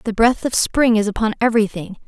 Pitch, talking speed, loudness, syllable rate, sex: 220 Hz, 205 wpm, -17 LUFS, 6.0 syllables/s, female